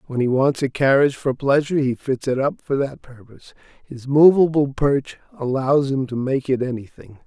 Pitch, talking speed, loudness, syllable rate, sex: 135 Hz, 190 wpm, -19 LUFS, 5.3 syllables/s, male